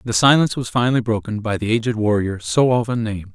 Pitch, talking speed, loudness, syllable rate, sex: 115 Hz, 215 wpm, -19 LUFS, 6.5 syllables/s, male